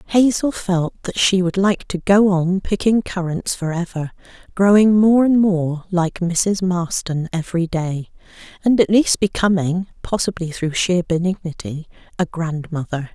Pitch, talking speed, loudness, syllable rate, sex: 180 Hz, 145 wpm, -18 LUFS, 3.8 syllables/s, female